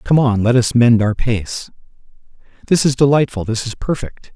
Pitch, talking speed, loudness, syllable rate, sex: 120 Hz, 180 wpm, -16 LUFS, 4.9 syllables/s, male